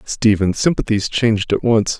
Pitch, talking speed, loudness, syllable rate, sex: 110 Hz, 150 wpm, -17 LUFS, 4.8 syllables/s, male